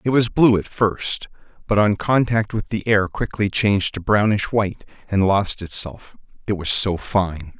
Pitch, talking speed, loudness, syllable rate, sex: 100 Hz, 180 wpm, -20 LUFS, 4.4 syllables/s, male